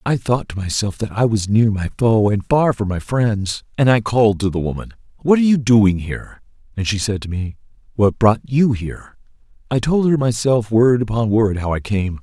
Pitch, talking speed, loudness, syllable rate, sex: 110 Hz, 220 wpm, -17 LUFS, 5.1 syllables/s, male